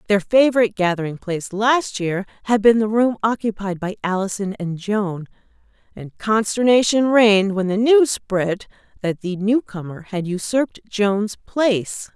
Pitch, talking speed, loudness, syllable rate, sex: 205 Hz, 145 wpm, -19 LUFS, 4.5 syllables/s, female